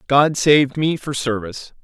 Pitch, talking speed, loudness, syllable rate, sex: 140 Hz, 165 wpm, -18 LUFS, 5.0 syllables/s, male